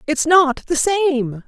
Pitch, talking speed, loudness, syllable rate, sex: 300 Hz, 165 wpm, -16 LUFS, 3.2 syllables/s, female